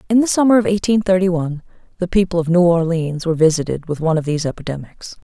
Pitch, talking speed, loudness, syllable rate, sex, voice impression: 175 Hz, 215 wpm, -17 LUFS, 7.1 syllables/s, female, very feminine, slightly adult-like, slightly thin, slightly weak, slightly dark, slightly hard, clear, fluent, cute, very intellectual, refreshing, sincere, calm, very friendly, reassuring, unique, very wild, very sweet, lively, light